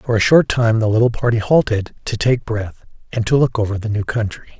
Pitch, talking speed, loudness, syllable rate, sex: 115 Hz, 235 wpm, -17 LUFS, 5.6 syllables/s, male